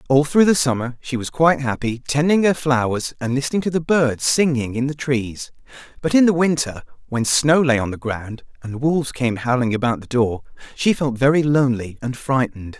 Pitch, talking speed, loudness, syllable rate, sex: 135 Hz, 200 wpm, -19 LUFS, 5.3 syllables/s, male